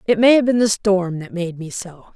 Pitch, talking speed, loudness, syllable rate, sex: 195 Hz, 280 wpm, -18 LUFS, 5.2 syllables/s, female